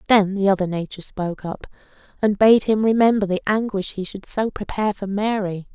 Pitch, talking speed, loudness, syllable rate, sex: 200 Hz, 190 wpm, -21 LUFS, 5.7 syllables/s, female